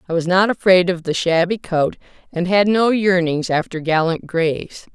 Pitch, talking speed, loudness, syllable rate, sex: 180 Hz, 180 wpm, -17 LUFS, 4.6 syllables/s, female